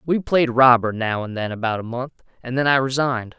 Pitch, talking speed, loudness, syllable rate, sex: 125 Hz, 230 wpm, -20 LUFS, 5.7 syllables/s, male